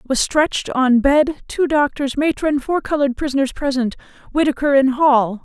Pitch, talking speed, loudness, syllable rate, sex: 275 Hz, 155 wpm, -17 LUFS, 4.9 syllables/s, female